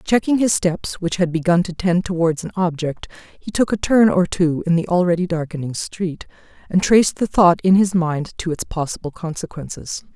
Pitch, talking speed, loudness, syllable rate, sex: 175 Hz, 195 wpm, -19 LUFS, 5.1 syllables/s, female